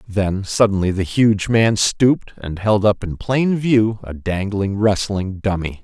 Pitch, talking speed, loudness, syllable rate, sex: 105 Hz, 165 wpm, -18 LUFS, 3.9 syllables/s, male